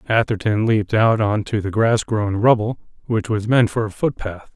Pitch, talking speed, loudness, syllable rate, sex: 110 Hz, 200 wpm, -19 LUFS, 4.9 syllables/s, male